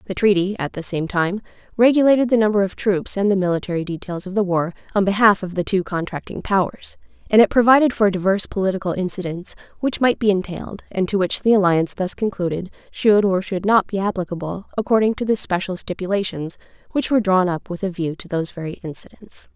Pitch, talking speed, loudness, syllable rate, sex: 195 Hz, 200 wpm, -20 LUFS, 6.0 syllables/s, female